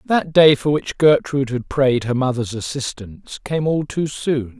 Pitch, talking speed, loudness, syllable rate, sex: 135 Hz, 185 wpm, -18 LUFS, 4.5 syllables/s, male